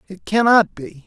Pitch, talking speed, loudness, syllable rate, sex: 200 Hz, 170 wpm, -16 LUFS, 4.4 syllables/s, male